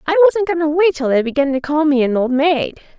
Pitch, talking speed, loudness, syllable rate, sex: 300 Hz, 280 wpm, -16 LUFS, 5.6 syllables/s, female